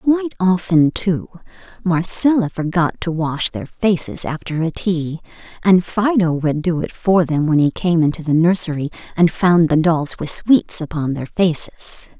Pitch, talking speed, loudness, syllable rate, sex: 170 Hz, 165 wpm, -17 LUFS, 4.4 syllables/s, female